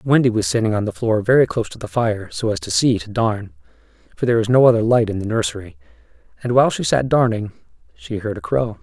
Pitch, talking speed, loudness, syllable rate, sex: 105 Hz, 240 wpm, -18 LUFS, 6.4 syllables/s, male